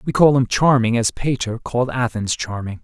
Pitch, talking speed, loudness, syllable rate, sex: 120 Hz, 190 wpm, -19 LUFS, 5.2 syllables/s, male